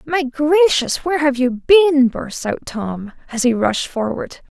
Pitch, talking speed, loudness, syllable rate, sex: 270 Hz, 170 wpm, -17 LUFS, 3.9 syllables/s, female